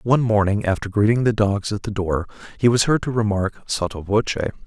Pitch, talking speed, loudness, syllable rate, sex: 105 Hz, 205 wpm, -20 LUFS, 5.7 syllables/s, male